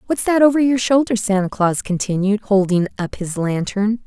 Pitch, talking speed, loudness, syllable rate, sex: 210 Hz, 175 wpm, -18 LUFS, 5.1 syllables/s, female